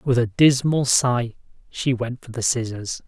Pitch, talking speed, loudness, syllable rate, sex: 125 Hz, 175 wpm, -21 LUFS, 4.1 syllables/s, male